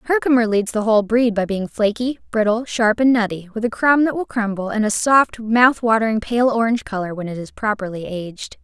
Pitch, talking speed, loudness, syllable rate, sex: 220 Hz, 215 wpm, -18 LUFS, 5.5 syllables/s, female